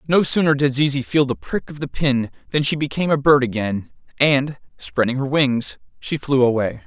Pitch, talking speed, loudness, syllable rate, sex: 140 Hz, 200 wpm, -19 LUFS, 5.2 syllables/s, male